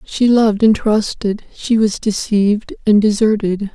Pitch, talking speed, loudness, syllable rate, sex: 210 Hz, 145 wpm, -15 LUFS, 4.3 syllables/s, female